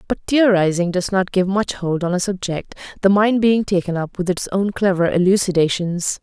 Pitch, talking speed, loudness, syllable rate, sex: 185 Hz, 195 wpm, -18 LUFS, 5.0 syllables/s, female